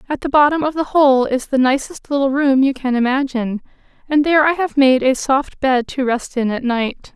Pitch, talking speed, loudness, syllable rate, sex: 270 Hz, 225 wpm, -16 LUFS, 5.2 syllables/s, female